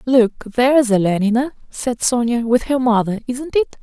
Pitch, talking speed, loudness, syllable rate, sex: 240 Hz, 155 wpm, -17 LUFS, 4.7 syllables/s, female